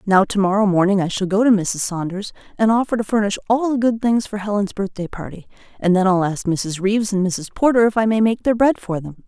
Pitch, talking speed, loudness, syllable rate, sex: 205 Hz, 245 wpm, -18 LUFS, 5.8 syllables/s, female